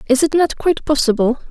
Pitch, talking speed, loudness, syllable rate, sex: 280 Hz, 200 wpm, -16 LUFS, 6.0 syllables/s, female